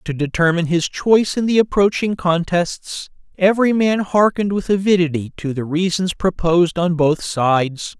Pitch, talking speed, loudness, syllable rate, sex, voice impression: 180 Hz, 150 wpm, -17 LUFS, 5.0 syllables/s, male, very masculine, slightly old, thick, very tensed, powerful, bright, slightly soft, very clear, fluent, slightly raspy, cool, intellectual, slightly refreshing, very sincere, very calm, very mature, friendly, reassuring, very unique, slightly elegant, slightly wild, slightly sweet, lively, slightly kind, slightly intense